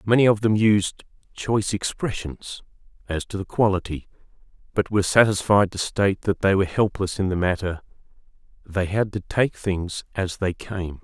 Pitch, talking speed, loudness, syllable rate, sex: 100 Hz, 165 wpm, -23 LUFS, 5.0 syllables/s, male